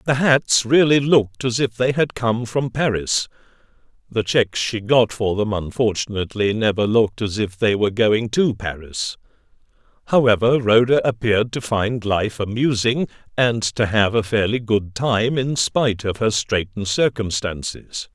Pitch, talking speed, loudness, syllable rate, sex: 115 Hz, 155 wpm, -19 LUFS, 4.7 syllables/s, male